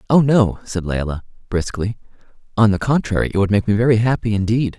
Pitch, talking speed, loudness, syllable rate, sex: 105 Hz, 190 wpm, -18 LUFS, 6.0 syllables/s, male